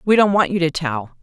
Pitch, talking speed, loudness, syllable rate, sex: 170 Hz, 295 wpm, -18 LUFS, 5.9 syllables/s, female